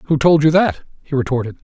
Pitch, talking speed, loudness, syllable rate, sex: 150 Hz, 210 wpm, -16 LUFS, 5.8 syllables/s, male